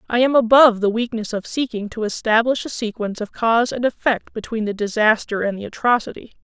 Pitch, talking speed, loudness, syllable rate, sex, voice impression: 225 Hz, 195 wpm, -19 LUFS, 6.0 syllables/s, female, feminine, gender-neutral, slightly young, slightly adult-like, thin, slightly tensed, weak, slightly dark, slightly hard, slightly muffled, slightly fluent, slightly cute, slightly intellectual, calm, slightly friendly, very unique, slightly lively, slightly strict, slightly sharp, modest